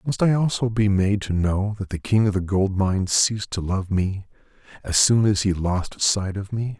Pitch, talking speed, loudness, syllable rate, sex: 100 Hz, 230 wpm, -22 LUFS, 4.8 syllables/s, male